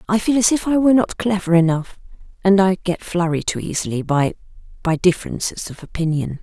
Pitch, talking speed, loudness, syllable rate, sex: 180 Hz, 175 wpm, -19 LUFS, 5.8 syllables/s, female